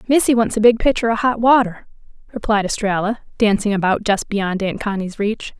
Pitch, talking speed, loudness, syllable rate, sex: 215 Hz, 180 wpm, -18 LUFS, 5.4 syllables/s, female